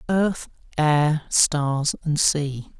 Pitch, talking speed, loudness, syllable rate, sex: 150 Hz, 110 wpm, -21 LUFS, 2.4 syllables/s, male